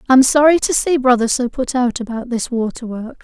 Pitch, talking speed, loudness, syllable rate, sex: 250 Hz, 225 wpm, -16 LUFS, 5.3 syllables/s, female